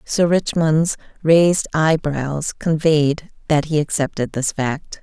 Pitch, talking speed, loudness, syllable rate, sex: 155 Hz, 120 wpm, -18 LUFS, 3.7 syllables/s, female